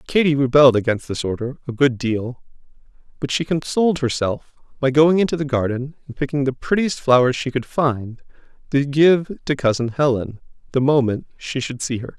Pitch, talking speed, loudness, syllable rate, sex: 135 Hz, 175 wpm, -19 LUFS, 5.2 syllables/s, male